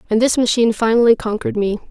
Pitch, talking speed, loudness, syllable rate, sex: 225 Hz, 190 wpm, -16 LUFS, 7.5 syllables/s, female